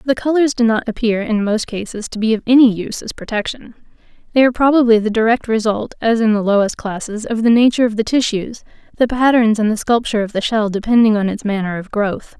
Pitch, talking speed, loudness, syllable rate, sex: 225 Hz, 225 wpm, -16 LUFS, 6.3 syllables/s, female